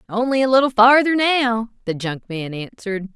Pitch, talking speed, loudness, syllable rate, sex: 230 Hz, 170 wpm, -18 LUFS, 5.0 syllables/s, female